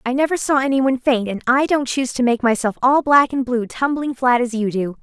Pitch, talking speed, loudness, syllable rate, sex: 255 Hz, 250 wpm, -18 LUFS, 5.6 syllables/s, female